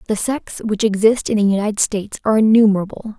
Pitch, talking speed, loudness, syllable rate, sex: 210 Hz, 190 wpm, -17 LUFS, 6.5 syllables/s, female